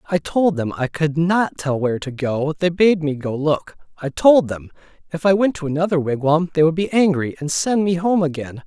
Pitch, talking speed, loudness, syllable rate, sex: 160 Hz, 230 wpm, -19 LUFS, 5.1 syllables/s, male